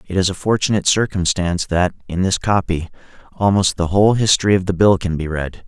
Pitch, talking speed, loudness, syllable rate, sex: 95 Hz, 200 wpm, -17 LUFS, 6.0 syllables/s, male